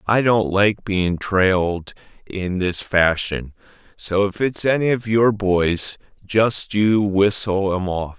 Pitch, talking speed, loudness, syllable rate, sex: 100 Hz, 145 wpm, -19 LUFS, 3.4 syllables/s, male